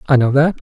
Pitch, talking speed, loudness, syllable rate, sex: 140 Hz, 270 wpm, -14 LUFS, 6.7 syllables/s, male